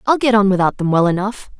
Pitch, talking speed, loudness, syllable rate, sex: 205 Hz, 265 wpm, -16 LUFS, 6.3 syllables/s, female